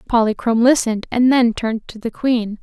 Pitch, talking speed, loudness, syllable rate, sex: 230 Hz, 185 wpm, -17 LUFS, 5.8 syllables/s, female